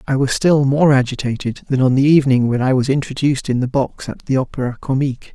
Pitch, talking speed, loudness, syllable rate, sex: 135 Hz, 225 wpm, -17 LUFS, 6.3 syllables/s, male